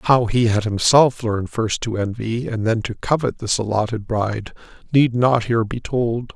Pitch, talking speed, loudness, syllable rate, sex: 115 Hz, 190 wpm, -20 LUFS, 4.8 syllables/s, male